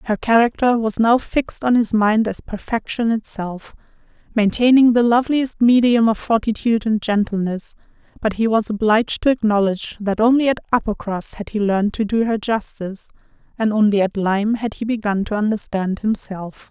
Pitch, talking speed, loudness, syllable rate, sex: 220 Hz, 165 wpm, -18 LUFS, 5.3 syllables/s, female